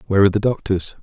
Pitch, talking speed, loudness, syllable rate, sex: 100 Hz, 235 wpm, -18 LUFS, 8.4 syllables/s, male